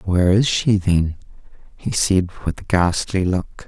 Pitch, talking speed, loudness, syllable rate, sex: 95 Hz, 165 wpm, -19 LUFS, 4.2 syllables/s, male